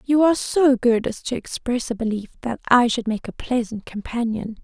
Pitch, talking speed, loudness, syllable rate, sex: 240 Hz, 205 wpm, -21 LUFS, 5.1 syllables/s, female